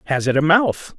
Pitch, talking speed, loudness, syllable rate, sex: 155 Hz, 245 wpm, -17 LUFS, 5.1 syllables/s, male